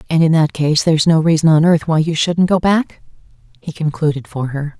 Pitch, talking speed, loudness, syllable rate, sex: 160 Hz, 225 wpm, -15 LUFS, 5.5 syllables/s, female